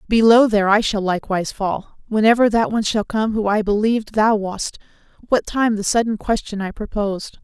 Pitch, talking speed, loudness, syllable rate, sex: 215 Hz, 185 wpm, -18 LUFS, 5.7 syllables/s, female